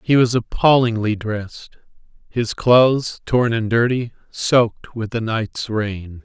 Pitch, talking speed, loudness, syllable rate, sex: 115 Hz, 135 wpm, -18 LUFS, 3.9 syllables/s, male